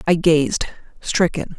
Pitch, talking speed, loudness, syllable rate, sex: 165 Hz, 115 wpm, -19 LUFS, 3.6 syllables/s, female